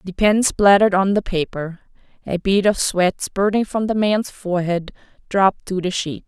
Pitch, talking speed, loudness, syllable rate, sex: 190 Hz, 170 wpm, -19 LUFS, 4.8 syllables/s, female